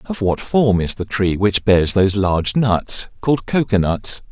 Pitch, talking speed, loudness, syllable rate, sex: 105 Hz, 195 wpm, -17 LUFS, 4.4 syllables/s, male